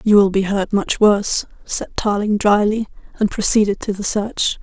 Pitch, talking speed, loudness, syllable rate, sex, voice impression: 205 Hz, 180 wpm, -17 LUFS, 4.7 syllables/s, female, very feminine, very adult-like, very middle-aged, very thin, relaxed, slightly weak, dark, hard, muffled, very fluent, slightly raspy, cute, very intellectual, slightly refreshing, slightly sincere, slightly calm, slightly friendly, reassuring, very unique, very elegant, wild, slightly sweet, slightly lively, slightly strict, slightly sharp, very modest, slightly light